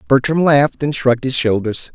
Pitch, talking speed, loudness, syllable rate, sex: 130 Hz, 185 wpm, -15 LUFS, 5.6 syllables/s, male